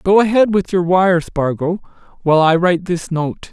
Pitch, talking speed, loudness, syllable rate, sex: 175 Hz, 190 wpm, -15 LUFS, 5.1 syllables/s, male